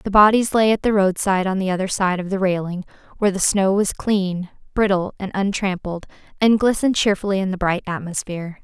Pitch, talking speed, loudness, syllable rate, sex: 195 Hz, 195 wpm, -20 LUFS, 5.8 syllables/s, female